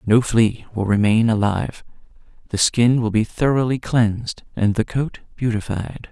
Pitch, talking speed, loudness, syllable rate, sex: 115 Hz, 145 wpm, -20 LUFS, 4.6 syllables/s, male